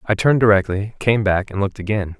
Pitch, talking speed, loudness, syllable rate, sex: 105 Hz, 220 wpm, -18 LUFS, 6.3 syllables/s, male